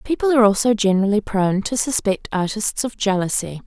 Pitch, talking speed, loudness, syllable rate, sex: 215 Hz, 165 wpm, -19 LUFS, 6.0 syllables/s, female